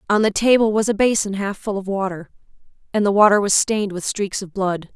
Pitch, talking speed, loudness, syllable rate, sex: 200 Hz, 230 wpm, -19 LUFS, 5.8 syllables/s, female